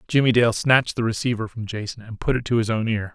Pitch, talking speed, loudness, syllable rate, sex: 110 Hz, 265 wpm, -22 LUFS, 6.4 syllables/s, male